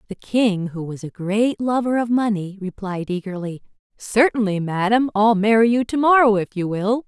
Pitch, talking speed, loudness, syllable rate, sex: 210 Hz, 180 wpm, -20 LUFS, 4.8 syllables/s, female